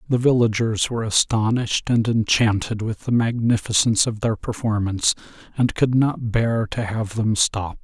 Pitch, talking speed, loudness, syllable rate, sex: 110 Hz, 155 wpm, -20 LUFS, 4.8 syllables/s, male